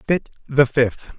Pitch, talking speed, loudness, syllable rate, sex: 130 Hz, 150 wpm, -19 LUFS, 3.4 syllables/s, male